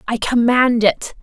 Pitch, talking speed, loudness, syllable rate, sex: 235 Hz, 145 wpm, -15 LUFS, 3.9 syllables/s, female